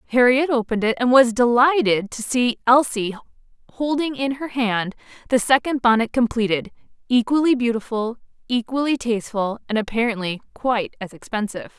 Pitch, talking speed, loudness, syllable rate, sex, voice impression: 235 Hz, 125 wpm, -20 LUFS, 5.4 syllables/s, female, feminine, adult-like, slightly powerful, clear, fluent, intellectual, calm, slightly friendly, unique, lively, slightly strict, slightly intense, slightly sharp